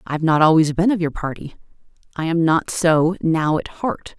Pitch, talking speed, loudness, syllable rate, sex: 165 Hz, 215 wpm, -18 LUFS, 5.0 syllables/s, female